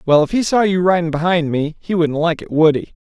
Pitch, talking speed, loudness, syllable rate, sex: 165 Hz, 275 wpm, -16 LUFS, 5.7 syllables/s, male